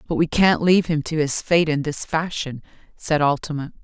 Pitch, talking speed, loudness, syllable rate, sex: 155 Hz, 205 wpm, -20 LUFS, 5.2 syllables/s, female